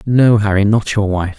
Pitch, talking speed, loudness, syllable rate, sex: 105 Hz, 215 wpm, -14 LUFS, 4.7 syllables/s, male